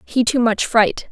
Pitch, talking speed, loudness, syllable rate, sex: 235 Hz, 215 wpm, -17 LUFS, 4.0 syllables/s, female